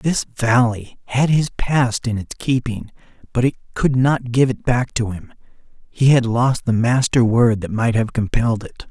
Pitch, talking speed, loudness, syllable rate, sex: 120 Hz, 190 wpm, -18 LUFS, 4.5 syllables/s, male